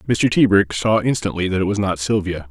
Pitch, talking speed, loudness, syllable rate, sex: 100 Hz, 215 wpm, -18 LUFS, 5.5 syllables/s, male